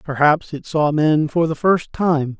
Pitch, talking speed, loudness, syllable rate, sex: 155 Hz, 200 wpm, -18 LUFS, 3.9 syllables/s, male